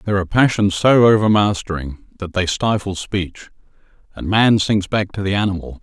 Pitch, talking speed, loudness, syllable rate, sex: 100 Hz, 165 wpm, -17 LUFS, 5.5 syllables/s, male